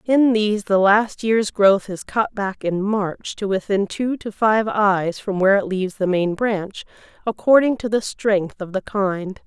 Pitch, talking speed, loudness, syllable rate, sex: 205 Hz, 195 wpm, -20 LUFS, 4.2 syllables/s, female